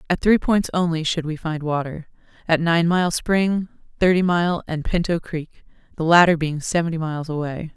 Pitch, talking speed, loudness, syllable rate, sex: 165 Hz, 180 wpm, -21 LUFS, 5.1 syllables/s, female